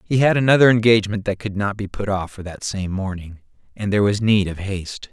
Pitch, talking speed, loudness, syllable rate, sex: 100 Hz, 235 wpm, -19 LUFS, 6.0 syllables/s, male